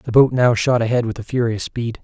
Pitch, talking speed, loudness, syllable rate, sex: 120 Hz, 235 wpm, -18 LUFS, 5.0 syllables/s, male